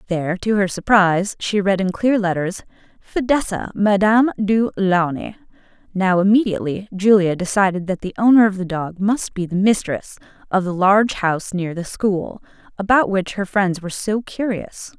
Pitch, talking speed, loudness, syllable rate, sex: 195 Hz, 165 wpm, -18 LUFS, 5.0 syllables/s, female